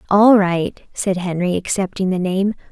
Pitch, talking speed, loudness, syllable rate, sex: 190 Hz, 155 wpm, -18 LUFS, 4.4 syllables/s, female